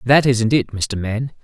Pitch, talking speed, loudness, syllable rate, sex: 120 Hz, 210 wpm, -18 LUFS, 4.0 syllables/s, male